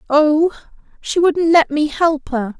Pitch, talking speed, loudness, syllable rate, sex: 305 Hz, 160 wpm, -16 LUFS, 3.7 syllables/s, female